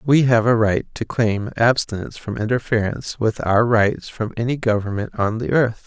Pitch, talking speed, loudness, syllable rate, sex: 115 Hz, 185 wpm, -20 LUFS, 4.9 syllables/s, male